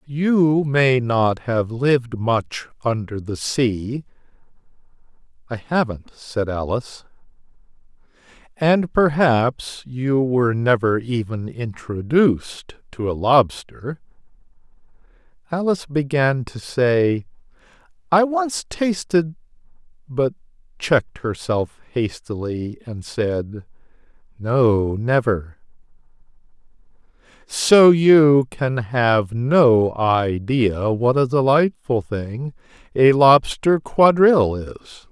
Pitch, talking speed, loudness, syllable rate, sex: 130 Hz, 85 wpm, -19 LUFS, 3.5 syllables/s, male